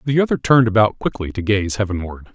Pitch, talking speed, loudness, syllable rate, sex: 105 Hz, 205 wpm, -18 LUFS, 6.2 syllables/s, male